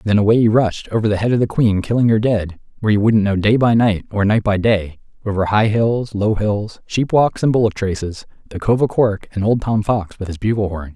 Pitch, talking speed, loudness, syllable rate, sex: 105 Hz, 250 wpm, -17 LUFS, 5.5 syllables/s, male